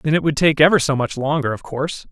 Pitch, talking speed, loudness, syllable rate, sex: 145 Hz, 285 wpm, -18 LUFS, 6.5 syllables/s, male